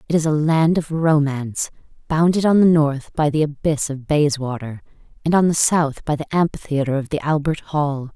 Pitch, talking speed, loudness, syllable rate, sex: 150 Hz, 190 wpm, -19 LUFS, 5.1 syllables/s, female